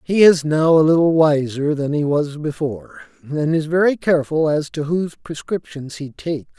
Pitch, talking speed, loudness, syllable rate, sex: 155 Hz, 180 wpm, -18 LUFS, 5.2 syllables/s, male